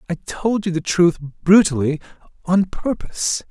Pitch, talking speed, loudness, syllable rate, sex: 180 Hz, 135 wpm, -19 LUFS, 4.2 syllables/s, male